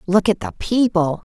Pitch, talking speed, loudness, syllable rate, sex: 185 Hz, 185 wpm, -19 LUFS, 4.7 syllables/s, female